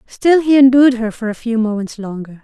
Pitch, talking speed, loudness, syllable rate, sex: 235 Hz, 220 wpm, -13 LUFS, 5.6 syllables/s, female